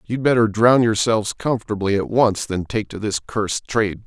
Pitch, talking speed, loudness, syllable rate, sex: 105 Hz, 190 wpm, -19 LUFS, 5.4 syllables/s, male